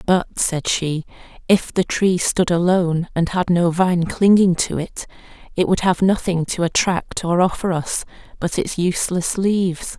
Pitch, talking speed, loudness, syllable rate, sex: 175 Hz, 170 wpm, -19 LUFS, 4.3 syllables/s, female